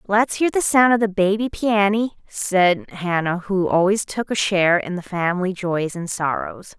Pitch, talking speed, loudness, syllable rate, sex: 195 Hz, 185 wpm, -20 LUFS, 4.6 syllables/s, female